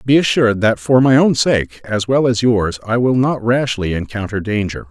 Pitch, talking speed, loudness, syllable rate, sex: 115 Hz, 210 wpm, -15 LUFS, 4.9 syllables/s, male